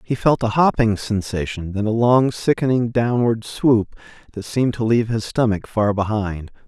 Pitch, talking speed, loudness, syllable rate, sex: 110 Hz, 170 wpm, -19 LUFS, 4.8 syllables/s, male